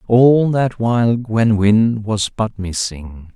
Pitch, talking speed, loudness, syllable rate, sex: 110 Hz, 145 wpm, -16 LUFS, 3.2 syllables/s, male